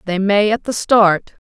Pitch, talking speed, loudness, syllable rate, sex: 205 Hz, 205 wpm, -15 LUFS, 4.0 syllables/s, female